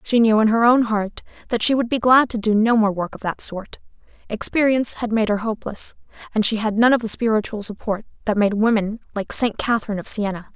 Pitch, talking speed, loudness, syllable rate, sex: 220 Hz, 225 wpm, -19 LUFS, 5.9 syllables/s, female